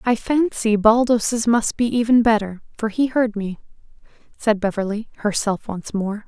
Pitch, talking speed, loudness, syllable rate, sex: 220 Hz, 155 wpm, -20 LUFS, 4.5 syllables/s, female